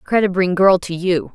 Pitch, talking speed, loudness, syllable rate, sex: 185 Hz, 225 wpm, -16 LUFS, 4.8 syllables/s, female